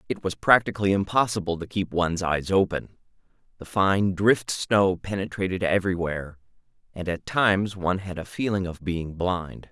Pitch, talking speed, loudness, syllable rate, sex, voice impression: 95 Hz, 155 wpm, -25 LUFS, 5.2 syllables/s, male, very masculine, adult-like, slightly middle-aged, very thick, tensed, very powerful, slightly bright, hard, slightly muffled, very fluent, slightly raspy, cool, very intellectual, refreshing, very sincere, very calm, mature, friendly, reassuring, very unique, wild, slightly sweet, kind, modest